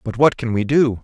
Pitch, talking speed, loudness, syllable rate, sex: 125 Hz, 290 wpm, -18 LUFS, 5.4 syllables/s, male